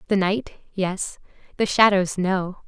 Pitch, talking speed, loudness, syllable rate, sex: 195 Hz, 135 wpm, -22 LUFS, 3.7 syllables/s, female